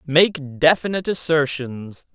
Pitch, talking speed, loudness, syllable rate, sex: 150 Hz, 85 wpm, -19 LUFS, 4.1 syllables/s, male